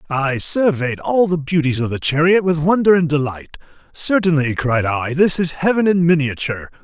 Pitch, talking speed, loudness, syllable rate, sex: 155 Hz, 175 wpm, -17 LUFS, 5.1 syllables/s, male